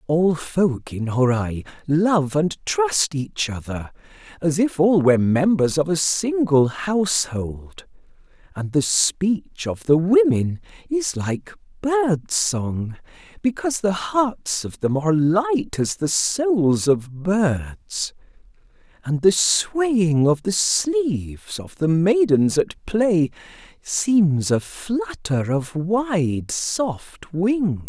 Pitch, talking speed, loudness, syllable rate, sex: 175 Hz, 120 wpm, -20 LUFS, 3.1 syllables/s, male